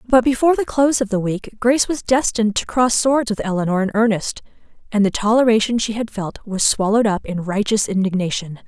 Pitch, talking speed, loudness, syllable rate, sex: 220 Hz, 200 wpm, -18 LUFS, 6.0 syllables/s, female